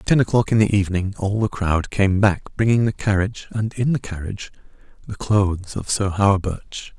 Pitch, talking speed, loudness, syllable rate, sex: 100 Hz, 195 wpm, -20 LUFS, 5.4 syllables/s, male